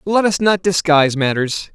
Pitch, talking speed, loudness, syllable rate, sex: 170 Hz, 170 wpm, -16 LUFS, 4.9 syllables/s, male